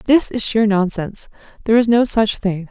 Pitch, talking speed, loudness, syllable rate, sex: 215 Hz, 200 wpm, -16 LUFS, 5.2 syllables/s, female